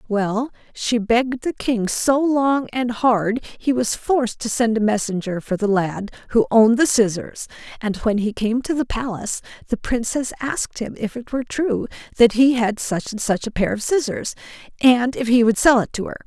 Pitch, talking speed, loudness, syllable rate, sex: 235 Hz, 205 wpm, -20 LUFS, 4.8 syllables/s, female